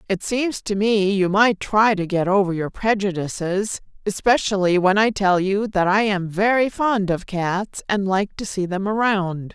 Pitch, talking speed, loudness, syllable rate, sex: 200 Hz, 190 wpm, -20 LUFS, 4.3 syllables/s, female